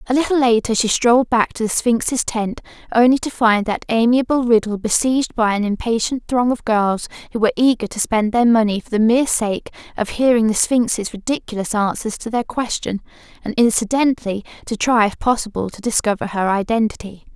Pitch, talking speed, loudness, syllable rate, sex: 225 Hz, 185 wpm, -18 LUFS, 5.5 syllables/s, female